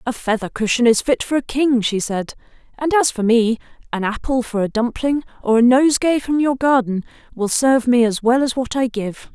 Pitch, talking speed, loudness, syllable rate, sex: 245 Hz, 220 wpm, -18 LUFS, 5.3 syllables/s, female